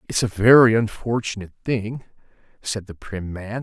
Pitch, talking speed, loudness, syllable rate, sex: 110 Hz, 150 wpm, -20 LUFS, 5.0 syllables/s, male